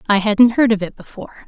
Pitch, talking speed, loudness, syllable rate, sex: 220 Hz, 245 wpm, -15 LUFS, 6.5 syllables/s, female